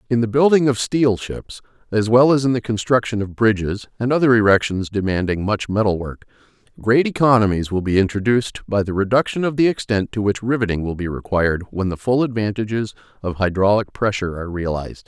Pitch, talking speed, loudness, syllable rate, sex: 110 Hz, 185 wpm, -19 LUFS, 5.9 syllables/s, male